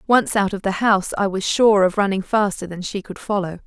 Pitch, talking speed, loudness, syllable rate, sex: 200 Hz, 245 wpm, -19 LUFS, 5.5 syllables/s, female